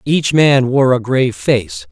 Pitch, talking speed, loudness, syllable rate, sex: 130 Hz, 190 wpm, -13 LUFS, 3.9 syllables/s, male